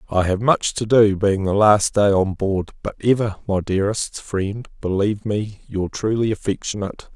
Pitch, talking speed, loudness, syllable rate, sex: 100 Hz, 175 wpm, -20 LUFS, 4.8 syllables/s, male